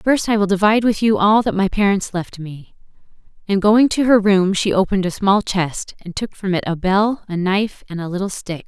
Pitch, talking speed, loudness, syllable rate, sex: 195 Hz, 240 wpm, -17 LUFS, 5.4 syllables/s, female